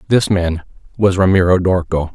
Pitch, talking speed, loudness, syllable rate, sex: 90 Hz, 140 wpm, -15 LUFS, 5.0 syllables/s, male